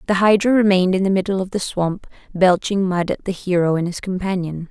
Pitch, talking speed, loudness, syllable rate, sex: 185 Hz, 215 wpm, -18 LUFS, 5.8 syllables/s, female